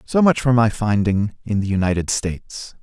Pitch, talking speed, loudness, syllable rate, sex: 110 Hz, 190 wpm, -19 LUFS, 5.0 syllables/s, male